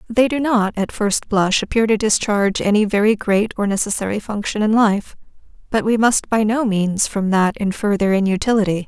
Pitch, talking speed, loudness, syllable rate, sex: 210 Hz, 190 wpm, -18 LUFS, 5.2 syllables/s, female